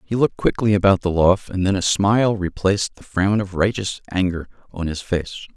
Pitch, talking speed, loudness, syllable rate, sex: 95 Hz, 205 wpm, -20 LUFS, 5.5 syllables/s, male